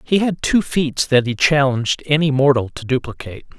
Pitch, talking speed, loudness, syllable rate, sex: 140 Hz, 185 wpm, -17 LUFS, 5.3 syllables/s, male